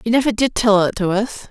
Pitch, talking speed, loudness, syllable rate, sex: 215 Hz, 280 wpm, -17 LUFS, 5.7 syllables/s, female